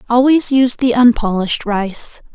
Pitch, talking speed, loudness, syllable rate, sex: 235 Hz, 130 wpm, -14 LUFS, 4.9 syllables/s, female